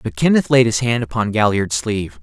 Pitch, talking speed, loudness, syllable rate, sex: 115 Hz, 215 wpm, -17 LUFS, 5.5 syllables/s, male